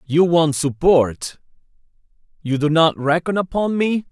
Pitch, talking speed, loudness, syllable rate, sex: 160 Hz, 115 wpm, -18 LUFS, 4.1 syllables/s, male